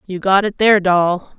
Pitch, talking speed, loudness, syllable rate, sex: 190 Hz, 215 wpm, -15 LUFS, 4.9 syllables/s, female